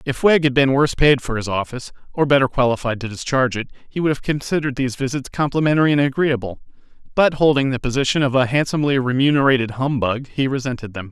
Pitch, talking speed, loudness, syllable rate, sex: 130 Hz, 195 wpm, -19 LUFS, 6.8 syllables/s, male